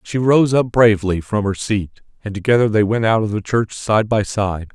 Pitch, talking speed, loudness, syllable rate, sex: 110 Hz, 240 wpm, -17 LUFS, 5.2 syllables/s, male